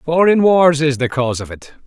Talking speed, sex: 225 wpm, male